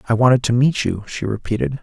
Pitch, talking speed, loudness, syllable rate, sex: 120 Hz, 230 wpm, -18 LUFS, 6.2 syllables/s, male